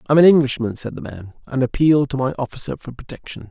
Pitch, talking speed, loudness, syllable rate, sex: 130 Hz, 240 wpm, -18 LUFS, 6.8 syllables/s, male